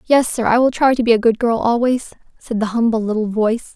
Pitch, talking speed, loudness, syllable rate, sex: 230 Hz, 255 wpm, -17 LUFS, 5.9 syllables/s, female